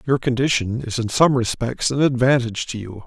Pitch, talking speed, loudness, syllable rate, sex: 125 Hz, 195 wpm, -20 LUFS, 5.4 syllables/s, male